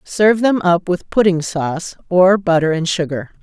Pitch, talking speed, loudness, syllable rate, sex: 180 Hz, 175 wpm, -16 LUFS, 4.8 syllables/s, female